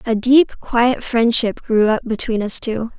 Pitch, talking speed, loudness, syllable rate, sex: 230 Hz, 180 wpm, -17 LUFS, 3.9 syllables/s, female